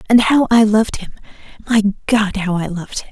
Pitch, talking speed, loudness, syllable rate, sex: 210 Hz, 210 wpm, -15 LUFS, 7.0 syllables/s, female